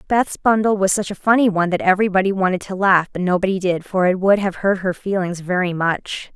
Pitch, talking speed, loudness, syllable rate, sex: 190 Hz, 225 wpm, -18 LUFS, 5.9 syllables/s, female